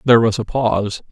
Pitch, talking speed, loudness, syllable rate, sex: 110 Hz, 215 wpm, -17 LUFS, 6.3 syllables/s, male